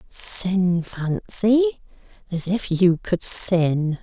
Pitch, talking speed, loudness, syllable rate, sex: 190 Hz, 105 wpm, -19 LUFS, 2.6 syllables/s, female